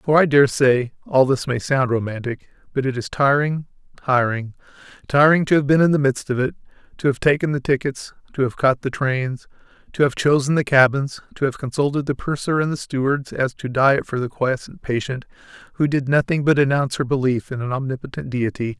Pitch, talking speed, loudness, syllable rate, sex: 135 Hz, 200 wpm, -20 LUFS, 5.6 syllables/s, male